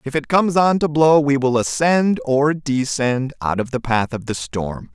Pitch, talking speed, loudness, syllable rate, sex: 140 Hz, 220 wpm, -18 LUFS, 4.4 syllables/s, male